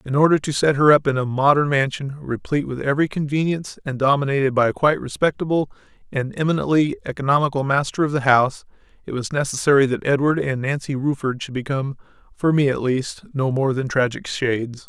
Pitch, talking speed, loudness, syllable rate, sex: 140 Hz, 185 wpm, -20 LUFS, 6.2 syllables/s, male